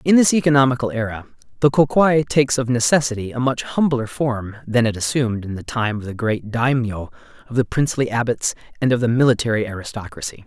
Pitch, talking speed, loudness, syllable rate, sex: 120 Hz, 190 wpm, -19 LUFS, 6.0 syllables/s, male